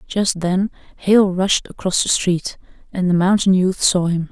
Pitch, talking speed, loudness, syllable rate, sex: 185 Hz, 180 wpm, -17 LUFS, 4.2 syllables/s, female